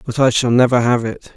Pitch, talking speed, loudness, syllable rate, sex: 120 Hz, 265 wpm, -15 LUFS, 5.7 syllables/s, male